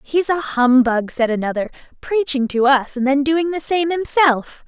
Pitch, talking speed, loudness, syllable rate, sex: 280 Hz, 180 wpm, -17 LUFS, 4.5 syllables/s, female